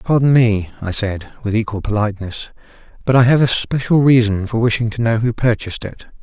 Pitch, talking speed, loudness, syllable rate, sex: 115 Hz, 195 wpm, -16 LUFS, 5.7 syllables/s, male